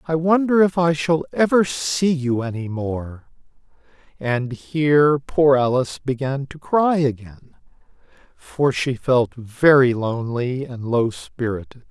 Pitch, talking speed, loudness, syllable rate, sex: 135 Hz, 130 wpm, -20 LUFS, 3.9 syllables/s, male